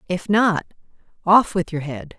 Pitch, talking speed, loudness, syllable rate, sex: 185 Hz, 165 wpm, -20 LUFS, 4.3 syllables/s, female